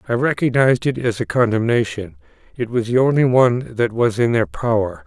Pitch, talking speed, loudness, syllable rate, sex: 120 Hz, 190 wpm, -18 LUFS, 5.6 syllables/s, male